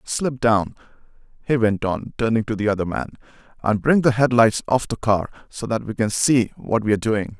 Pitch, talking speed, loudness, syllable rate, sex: 115 Hz, 205 wpm, -20 LUFS, 5.1 syllables/s, male